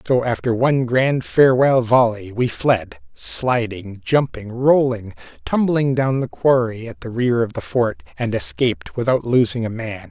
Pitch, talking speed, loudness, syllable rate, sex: 125 Hz, 160 wpm, -19 LUFS, 4.4 syllables/s, male